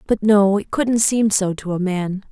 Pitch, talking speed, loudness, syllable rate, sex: 200 Hz, 235 wpm, -18 LUFS, 4.3 syllables/s, female